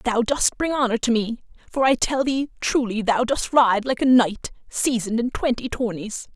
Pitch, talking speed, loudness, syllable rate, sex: 240 Hz, 200 wpm, -21 LUFS, 4.8 syllables/s, female